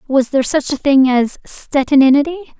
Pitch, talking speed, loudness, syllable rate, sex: 275 Hz, 160 wpm, -14 LUFS, 5.7 syllables/s, female